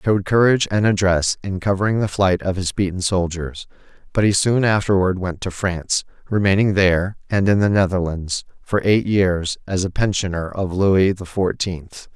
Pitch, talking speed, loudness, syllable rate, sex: 95 Hz, 180 wpm, -19 LUFS, 5.1 syllables/s, male